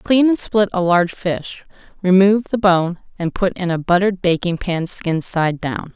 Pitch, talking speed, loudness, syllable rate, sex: 185 Hz, 190 wpm, -17 LUFS, 4.7 syllables/s, female